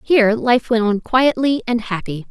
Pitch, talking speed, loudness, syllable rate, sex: 230 Hz, 180 wpm, -17 LUFS, 4.7 syllables/s, female